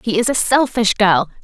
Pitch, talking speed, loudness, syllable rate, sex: 220 Hz, 210 wpm, -15 LUFS, 4.9 syllables/s, female